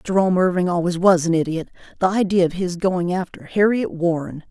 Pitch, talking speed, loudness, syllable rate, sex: 180 Hz, 185 wpm, -20 LUFS, 5.7 syllables/s, female